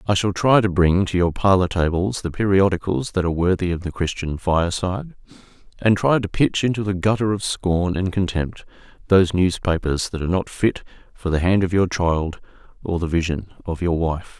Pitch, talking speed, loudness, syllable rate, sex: 90 Hz, 195 wpm, -20 LUFS, 5.4 syllables/s, male